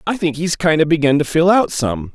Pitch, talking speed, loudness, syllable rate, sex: 155 Hz, 280 wpm, -16 LUFS, 5.4 syllables/s, male